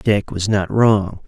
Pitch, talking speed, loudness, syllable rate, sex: 100 Hz, 190 wpm, -17 LUFS, 3.4 syllables/s, male